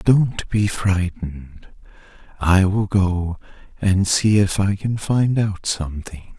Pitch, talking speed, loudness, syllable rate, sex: 95 Hz, 130 wpm, -20 LUFS, 3.4 syllables/s, male